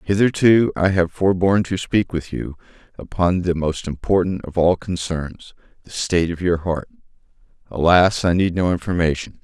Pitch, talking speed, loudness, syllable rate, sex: 90 Hz, 155 wpm, -19 LUFS, 4.9 syllables/s, male